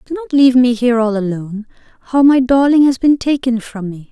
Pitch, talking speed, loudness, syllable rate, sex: 250 Hz, 220 wpm, -13 LUFS, 6.0 syllables/s, female